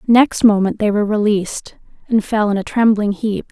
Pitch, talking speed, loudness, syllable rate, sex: 210 Hz, 190 wpm, -16 LUFS, 5.2 syllables/s, female